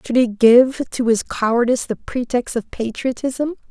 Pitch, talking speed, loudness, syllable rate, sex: 245 Hz, 160 wpm, -18 LUFS, 4.6 syllables/s, female